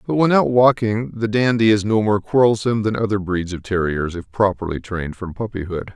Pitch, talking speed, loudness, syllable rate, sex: 105 Hz, 200 wpm, -19 LUFS, 5.6 syllables/s, male